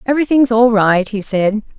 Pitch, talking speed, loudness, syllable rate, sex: 225 Hz, 170 wpm, -14 LUFS, 5.2 syllables/s, female